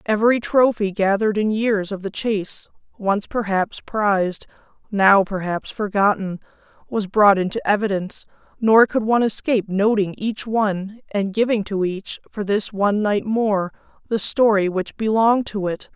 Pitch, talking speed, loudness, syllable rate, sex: 205 Hz, 150 wpm, -20 LUFS, 4.8 syllables/s, female